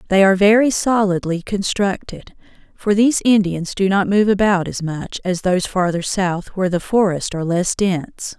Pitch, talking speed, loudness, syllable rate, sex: 190 Hz, 170 wpm, -17 LUFS, 5.2 syllables/s, female